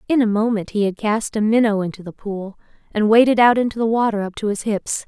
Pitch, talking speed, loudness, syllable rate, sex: 215 Hz, 250 wpm, -19 LUFS, 5.9 syllables/s, female